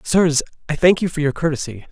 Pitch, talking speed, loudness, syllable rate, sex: 155 Hz, 220 wpm, -18 LUFS, 5.9 syllables/s, male